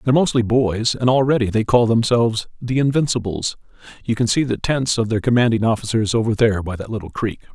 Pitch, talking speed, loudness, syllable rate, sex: 115 Hz, 200 wpm, -19 LUFS, 6.1 syllables/s, male